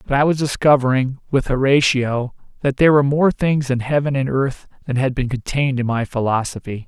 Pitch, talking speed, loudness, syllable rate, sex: 135 Hz, 190 wpm, -18 LUFS, 5.7 syllables/s, male